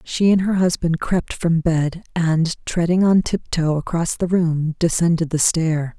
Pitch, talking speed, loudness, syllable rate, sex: 170 Hz, 170 wpm, -19 LUFS, 4.1 syllables/s, female